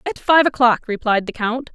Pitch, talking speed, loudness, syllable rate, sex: 245 Hz, 205 wpm, -17 LUFS, 5.2 syllables/s, female